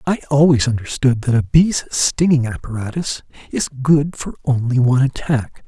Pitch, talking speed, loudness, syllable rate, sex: 135 Hz, 150 wpm, -17 LUFS, 4.8 syllables/s, male